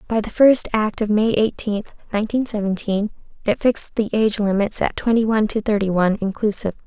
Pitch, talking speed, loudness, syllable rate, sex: 210 Hz, 185 wpm, -20 LUFS, 6.0 syllables/s, female